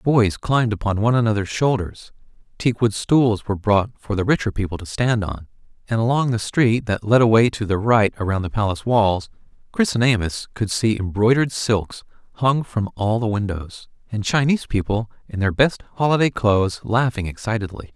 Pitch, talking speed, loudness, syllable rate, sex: 110 Hz, 175 wpm, -20 LUFS, 5.3 syllables/s, male